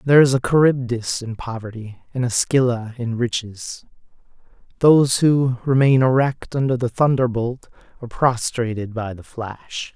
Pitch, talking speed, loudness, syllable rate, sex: 125 Hz, 140 wpm, -19 LUFS, 4.7 syllables/s, male